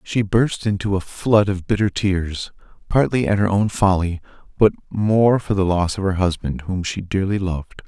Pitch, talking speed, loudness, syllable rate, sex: 95 Hz, 190 wpm, -20 LUFS, 4.7 syllables/s, male